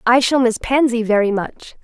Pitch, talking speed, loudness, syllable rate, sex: 240 Hz, 195 wpm, -16 LUFS, 4.8 syllables/s, female